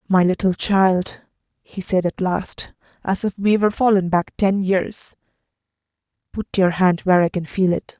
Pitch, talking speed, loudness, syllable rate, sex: 185 Hz, 175 wpm, -19 LUFS, 4.6 syllables/s, female